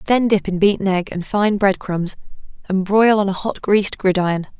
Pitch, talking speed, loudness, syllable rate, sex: 195 Hz, 210 wpm, -18 LUFS, 5.2 syllables/s, female